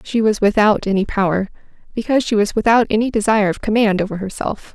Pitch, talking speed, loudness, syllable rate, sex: 210 Hz, 190 wpm, -17 LUFS, 6.5 syllables/s, female